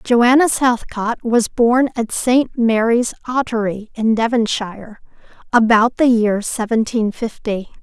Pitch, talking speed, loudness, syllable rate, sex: 230 Hz, 115 wpm, -16 LUFS, 3.9 syllables/s, female